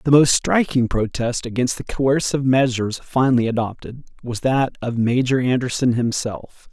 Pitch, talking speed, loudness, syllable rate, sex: 125 Hz, 150 wpm, -19 LUFS, 5.1 syllables/s, male